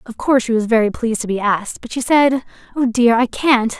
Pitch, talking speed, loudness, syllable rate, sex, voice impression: 235 Hz, 255 wpm, -17 LUFS, 5.9 syllables/s, female, feminine, slightly young, slightly powerful, slightly muffled, slightly unique, slightly light